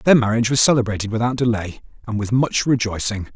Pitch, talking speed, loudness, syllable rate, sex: 115 Hz, 180 wpm, -19 LUFS, 6.2 syllables/s, male